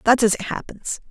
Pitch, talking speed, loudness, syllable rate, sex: 220 Hz, 215 wpm, -22 LUFS, 5.5 syllables/s, female